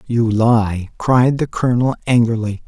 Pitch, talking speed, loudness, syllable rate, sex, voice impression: 115 Hz, 135 wpm, -16 LUFS, 4.3 syllables/s, male, masculine, adult-like, slightly thin, weak, slightly muffled, raspy, calm, reassuring, kind, modest